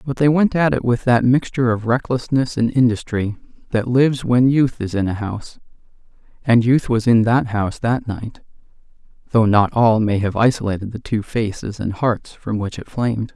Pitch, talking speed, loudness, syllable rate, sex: 115 Hz, 195 wpm, -18 LUFS, 5.1 syllables/s, male